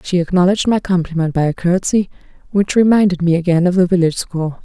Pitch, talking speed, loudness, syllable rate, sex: 180 Hz, 195 wpm, -15 LUFS, 6.4 syllables/s, female